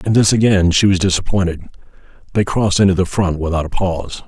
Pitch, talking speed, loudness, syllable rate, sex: 95 Hz, 195 wpm, -16 LUFS, 6.5 syllables/s, male